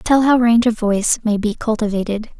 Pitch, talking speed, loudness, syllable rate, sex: 225 Hz, 200 wpm, -17 LUFS, 5.8 syllables/s, female